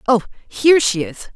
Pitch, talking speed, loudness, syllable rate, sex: 225 Hz, 175 wpm, -16 LUFS, 5.2 syllables/s, female